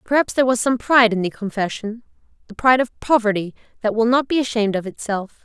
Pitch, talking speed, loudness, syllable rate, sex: 230 Hz, 210 wpm, -19 LUFS, 6.6 syllables/s, female